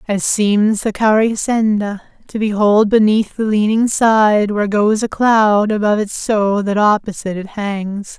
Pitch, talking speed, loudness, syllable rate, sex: 210 Hz, 155 wpm, -15 LUFS, 4.1 syllables/s, female